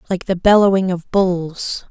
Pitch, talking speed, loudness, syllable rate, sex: 185 Hz, 155 wpm, -16 LUFS, 4.2 syllables/s, female